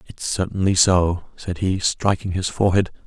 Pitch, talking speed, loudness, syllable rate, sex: 90 Hz, 155 wpm, -20 LUFS, 4.8 syllables/s, male